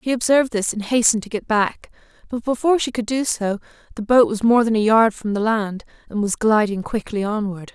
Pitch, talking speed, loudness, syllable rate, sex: 220 Hz, 225 wpm, -19 LUFS, 5.7 syllables/s, female